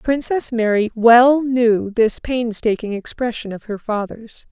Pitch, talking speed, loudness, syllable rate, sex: 230 Hz, 135 wpm, -17 LUFS, 3.9 syllables/s, female